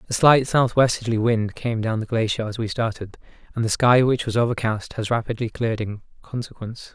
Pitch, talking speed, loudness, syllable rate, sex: 115 Hz, 200 wpm, -22 LUFS, 5.6 syllables/s, male